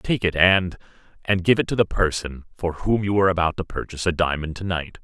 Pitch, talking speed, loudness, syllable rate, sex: 90 Hz, 225 wpm, -22 LUFS, 5.9 syllables/s, male